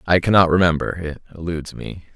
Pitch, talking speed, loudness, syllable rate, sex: 85 Hz, 165 wpm, -18 LUFS, 6.1 syllables/s, male